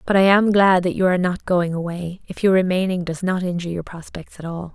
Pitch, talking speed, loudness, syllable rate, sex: 180 Hz, 240 wpm, -19 LUFS, 5.9 syllables/s, female